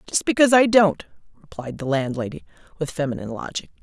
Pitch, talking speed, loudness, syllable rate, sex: 170 Hz, 155 wpm, -21 LUFS, 6.6 syllables/s, female